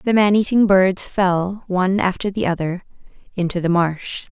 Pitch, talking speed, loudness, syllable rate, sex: 190 Hz, 150 wpm, -18 LUFS, 4.7 syllables/s, female